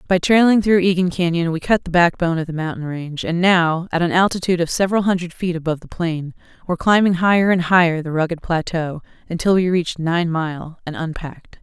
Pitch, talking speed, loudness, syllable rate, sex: 170 Hz, 205 wpm, -18 LUFS, 6.1 syllables/s, female